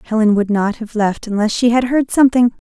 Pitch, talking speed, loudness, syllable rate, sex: 225 Hz, 225 wpm, -15 LUFS, 5.7 syllables/s, female